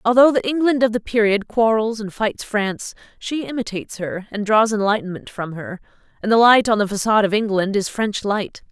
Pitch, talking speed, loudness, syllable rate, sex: 215 Hz, 200 wpm, -19 LUFS, 5.5 syllables/s, female